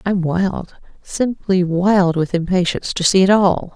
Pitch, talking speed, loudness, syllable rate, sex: 185 Hz, 145 wpm, -16 LUFS, 4.2 syllables/s, female